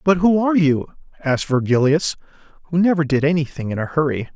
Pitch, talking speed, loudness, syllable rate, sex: 155 Hz, 180 wpm, -19 LUFS, 6.3 syllables/s, male